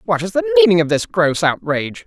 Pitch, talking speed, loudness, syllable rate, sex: 155 Hz, 230 wpm, -16 LUFS, 6.2 syllables/s, male